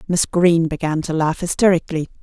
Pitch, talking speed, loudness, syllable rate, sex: 165 Hz, 160 wpm, -18 LUFS, 6.1 syllables/s, female